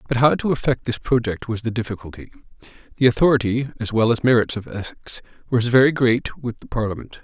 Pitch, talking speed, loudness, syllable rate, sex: 120 Hz, 190 wpm, -20 LUFS, 6.0 syllables/s, male